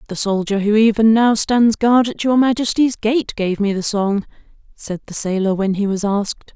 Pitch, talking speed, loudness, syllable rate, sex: 215 Hz, 200 wpm, -17 LUFS, 4.8 syllables/s, female